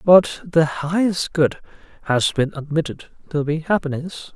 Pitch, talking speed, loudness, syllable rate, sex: 160 Hz, 140 wpm, -20 LUFS, 4.2 syllables/s, male